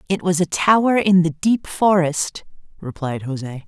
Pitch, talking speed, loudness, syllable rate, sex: 170 Hz, 165 wpm, -18 LUFS, 4.1 syllables/s, male